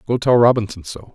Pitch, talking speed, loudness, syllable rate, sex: 115 Hz, 210 wpm, -15 LUFS, 5.8 syllables/s, male